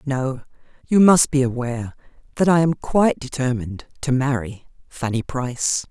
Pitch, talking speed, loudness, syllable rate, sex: 135 Hz, 140 wpm, -20 LUFS, 5.0 syllables/s, female